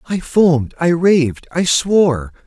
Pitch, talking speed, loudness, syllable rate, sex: 160 Hz, 95 wpm, -15 LUFS, 4.2 syllables/s, male